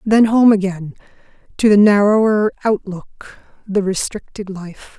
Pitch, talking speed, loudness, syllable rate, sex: 205 Hz, 120 wpm, -15 LUFS, 4.6 syllables/s, female